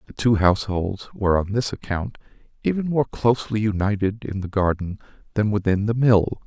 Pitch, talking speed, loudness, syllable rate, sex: 105 Hz, 165 wpm, -22 LUFS, 5.4 syllables/s, male